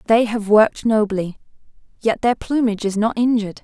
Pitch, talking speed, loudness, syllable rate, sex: 220 Hz, 165 wpm, -18 LUFS, 5.7 syllables/s, female